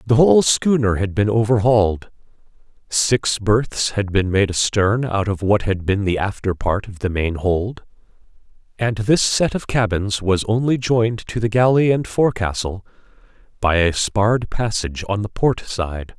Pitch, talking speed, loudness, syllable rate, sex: 105 Hz, 165 wpm, -19 LUFS, 4.6 syllables/s, male